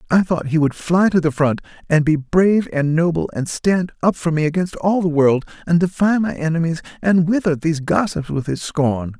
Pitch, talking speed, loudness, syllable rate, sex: 165 Hz, 215 wpm, -18 LUFS, 5.1 syllables/s, male